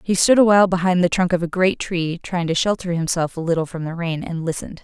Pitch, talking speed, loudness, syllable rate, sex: 175 Hz, 275 wpm, -19 LUFS, 6.2 syllables/s, female